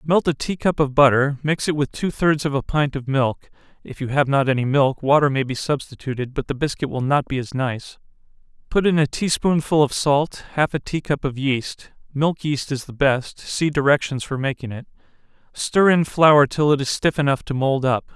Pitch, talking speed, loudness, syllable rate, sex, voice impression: 140 Hz, 220 wpm, -20 LUFS, 3.1 syllables/s, male, masculine, adult-like, tensed, clear, fluent, cool, intellectual, calm, friendly, slightly reassuring, wild, lively